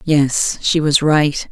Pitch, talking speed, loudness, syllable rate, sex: 150 Hz, 160 wpm, -15 LUFS, 2.9 syllables/s, female